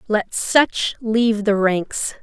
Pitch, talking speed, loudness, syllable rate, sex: 215 Hz, 135 wpm, -19 LUFS, 3.1 syllables/s, female